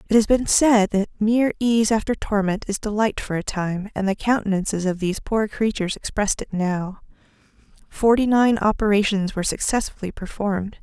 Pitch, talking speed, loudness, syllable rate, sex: 210 Hz, 165 wpm, -21 LUFS, 5.5 syllables/s, female